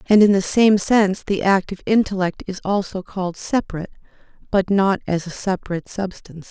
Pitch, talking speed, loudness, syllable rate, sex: 195 Hz, 165 wpm, -19 LUFS, 5.9 syllables/s, female